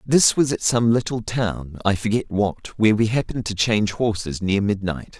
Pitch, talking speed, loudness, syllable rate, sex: 105 Hz, 195 wpm, -21 LUFS, 5.0 syllables/s, male